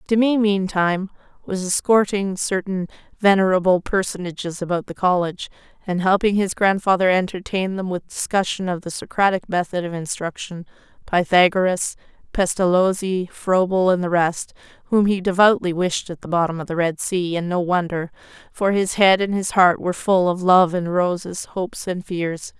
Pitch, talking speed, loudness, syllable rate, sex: 185 Hz, 155 wpm, -20 LUFS, 5.0 syllables/s, female